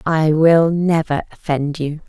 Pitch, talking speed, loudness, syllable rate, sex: 155 Hz, 145 wpm, -17 LUFS, 3.9 syllables/s, female